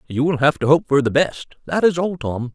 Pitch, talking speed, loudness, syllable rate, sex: 145 Hz, 285 wpm, -18 LUFS, 5.4 syllables/s, male